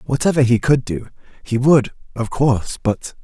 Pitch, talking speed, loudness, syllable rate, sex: 125 Hz, 165 wpm, -18 LUFS, 5.0 syllables/s, male